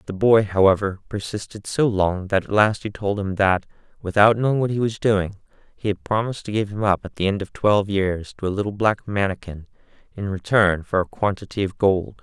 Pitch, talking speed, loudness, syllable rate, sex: 100 Hz, 215 wpm, -21 LUFS, 5.5 syllables/s, male